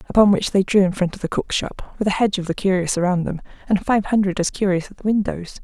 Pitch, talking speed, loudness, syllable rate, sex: 190 Hz, 275 wpm, -20 LUFS, 6.2 syllables/s, female